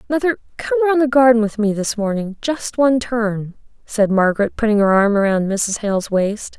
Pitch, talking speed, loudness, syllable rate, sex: 225 Hz, 190 wpm, -17 LUFS, 4.9 syllables/s, female